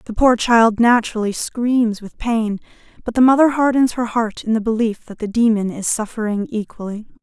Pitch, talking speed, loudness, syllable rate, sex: 225 Hz, 185 wpm, -17 LUFS, 5.1 syllables/s, female